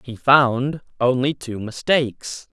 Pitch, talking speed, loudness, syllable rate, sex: 130 Hz, 115 wpm, -20 LUFS, 3.6 syllables/s, male